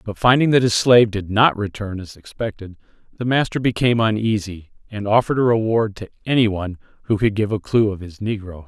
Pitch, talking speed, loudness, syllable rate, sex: 105 Hz, 200 wpm, -19 LUFS, 5.9 syllables/s, male